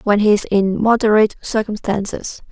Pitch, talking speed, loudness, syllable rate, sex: 210 Hz, 145 wpm, -17 LUFS, 5.3 syllables/s, female